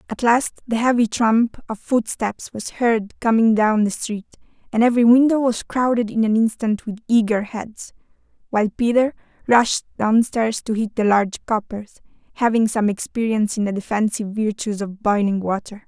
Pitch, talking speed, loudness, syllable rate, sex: 220 Hz, 165 wpm, -20 LUFS, 5.0 syllables/s, female